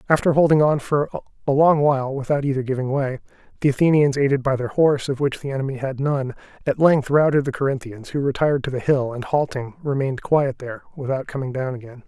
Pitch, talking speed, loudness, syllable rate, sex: 135 Hz, 210 wpm, -21 LUFS, 6.3 syllables/s, male